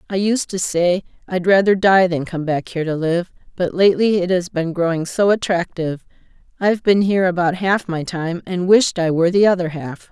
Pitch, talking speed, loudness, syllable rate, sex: 180 Hz, 210 wpm, -18 LUFS, 5.4 syllables/s, female